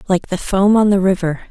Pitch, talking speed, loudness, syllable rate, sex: 190 Hz, 240 wpm, -15 LUFS, 5.2 syllables/s, female